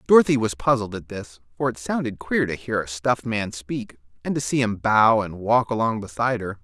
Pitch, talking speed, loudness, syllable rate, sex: 110 Hz, 225 wpm, -23 LUFS, 5.5 syllables/s, male